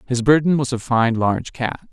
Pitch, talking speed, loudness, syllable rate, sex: 125 Hz, 220 wpm, -19 LUFS, 5.1 syllables/s, male